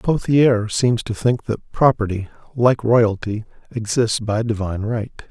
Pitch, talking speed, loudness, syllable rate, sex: 115 Hz, 135 wpm, -19 LUFS, 4.0 syllables/s, male